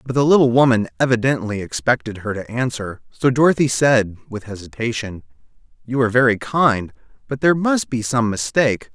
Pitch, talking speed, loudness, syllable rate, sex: 120 Hz, 160 wpm, -18 LUFS, 5.6 syllables/s, male